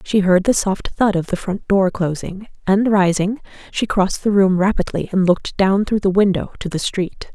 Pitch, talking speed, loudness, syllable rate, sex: 195 Hz, 210 wpm, -18 LUFS, 4.9 syllables/s, female